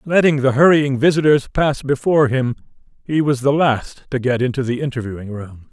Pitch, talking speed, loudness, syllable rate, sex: 135 Hz, 180 wpm, -17 LUFS, 5.3 syllables/s, male